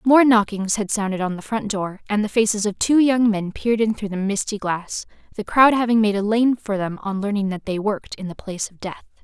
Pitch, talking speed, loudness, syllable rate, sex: 210 Hz, 255 wpm, -20 LUFS, 5.6 syllables/s, female